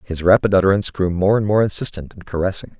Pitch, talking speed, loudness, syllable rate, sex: 95 Hz, 215 wpm, -18 LUFS, 7.1 syllables/s, male